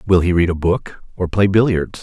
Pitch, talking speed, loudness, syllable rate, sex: 90 Hz, 235 wpm, -17 LUFS, 5.1 syllables/s, male